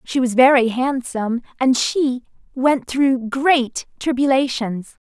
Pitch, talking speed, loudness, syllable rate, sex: 255 Hz, 120 wpm, -18 LUFS, 3.8 syllables/s, female